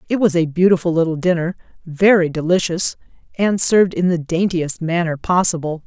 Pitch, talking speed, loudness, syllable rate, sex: 175 Hz, 155 wpm, -17 LUFS, 5.4 syllables/s, female